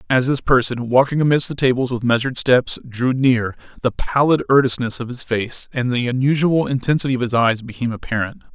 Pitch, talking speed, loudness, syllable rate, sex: 125 Hz, 190 wpm, -18 LUFS, 5.7 syllables/s, male